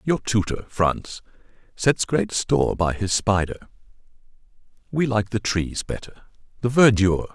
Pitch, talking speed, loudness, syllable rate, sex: 110 Hz, 125 wpm, -22 LUFS, 4.4 syllables/s, male